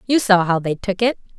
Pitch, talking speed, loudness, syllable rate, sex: 200 Hz, 260 wpm, -18 LUFS, 5.7 syllables/s, female